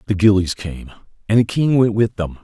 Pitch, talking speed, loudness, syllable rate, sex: 105 Hz, 220 wpm, -17 LUFS, 5.4 syllables/s, male